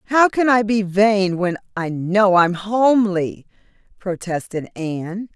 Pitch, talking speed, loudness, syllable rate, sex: 195 Hz, 135 wpm, -18 LUFS, 3.9 syllables/s, female